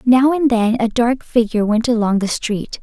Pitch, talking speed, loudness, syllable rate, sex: 235 Hz, 210 wpm, -16 LUFS, 4.8 syllables/s, female